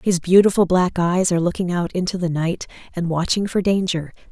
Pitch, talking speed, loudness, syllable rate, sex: 180 Hz, 195 wpm, -19 LUFS, 5.5 syllables/s, female